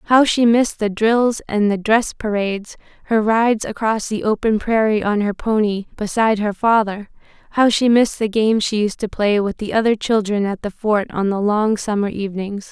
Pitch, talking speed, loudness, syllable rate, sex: 215 Hz, 200 wpm, -18 LUFS, 5.1 syllables/s, female